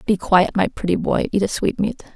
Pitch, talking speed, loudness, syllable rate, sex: 195 Hz, 225 wpm, -19 LUFS, 5.4 syllables/s, female